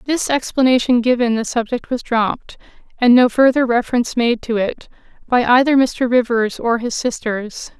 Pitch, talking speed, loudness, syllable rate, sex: 240 Hz, 160 wpm, -16 LUFS, 5.0 syllables/s, female